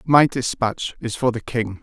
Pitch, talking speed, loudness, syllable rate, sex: 120 Hz, 195 wpm, -21 LUFS, 4.1 syllables/s, male